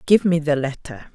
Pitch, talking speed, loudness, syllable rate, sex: 150 Hz, 210 wpm, -20 LUFS, 4.9 syllables/s, female